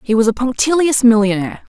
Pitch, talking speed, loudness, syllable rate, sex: 235 Hz, 170 wpm, -14 LUFS, 6.3 syllables/s, female